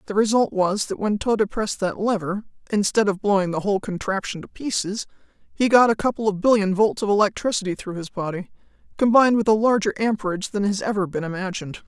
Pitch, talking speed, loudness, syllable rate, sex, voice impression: 205 Hz, 195 wpm, -22 LUFS, 6.2 syllables/s, female, slightly masculine, very adult-like, slightly muffled, unique